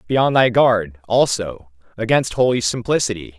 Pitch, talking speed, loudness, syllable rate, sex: 110 Hz, 140 wpm, -17 LUFS, 4.8 syllables/s, male